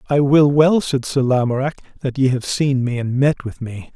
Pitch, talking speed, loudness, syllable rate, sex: 135 Hz, 230 wpm, -17 LUFS, 4.9 syllables/s, male